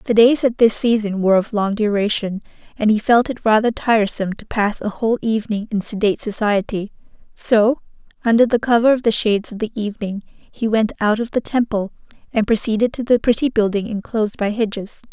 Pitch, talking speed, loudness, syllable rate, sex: 220 Hz, 190 wpm, -18 LUFS, 5.8 syllables/s, female